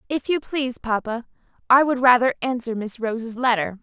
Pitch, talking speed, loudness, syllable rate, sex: 245 Hz, 175 wpm, -21 LUFS, 5.4 syllables/s, female